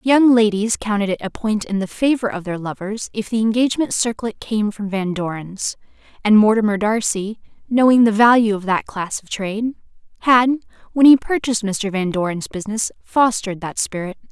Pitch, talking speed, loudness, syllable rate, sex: 215 Hz, 175 wpm, -18 LUFS, 5.3 syllables/s, female